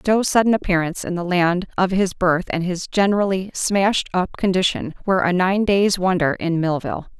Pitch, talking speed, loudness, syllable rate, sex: 185 Hz, 185 wpm, -19 LUFS, 5.3 syllables/s, female